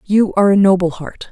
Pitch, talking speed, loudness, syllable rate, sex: 190 Hz, 230 wpm, -14 LUFS, 5.8 syllables/s, female